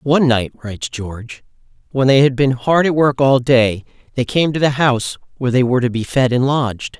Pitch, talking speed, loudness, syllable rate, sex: 130 Hz, 225 wpm, -16 LUFS, 5.5 syllables/s, male